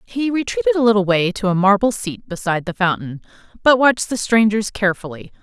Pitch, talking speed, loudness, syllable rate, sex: 210 Hz, 190 wpm, -17 LUFS, 6.0 syllables/s, female